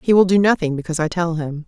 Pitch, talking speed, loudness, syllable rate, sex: 170 Hz, 285 wpm, -18 LUFS, 7.0 syllables/s, female